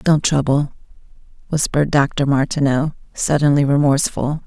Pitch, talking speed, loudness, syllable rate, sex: 145 Hz, 95 wpm, -17 LUFS, 4.9 syllables/s, female